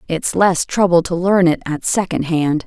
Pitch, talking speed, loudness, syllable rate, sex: 175 Hz, 200 wpm, -16 LUFS, 4.5 syllables/s, female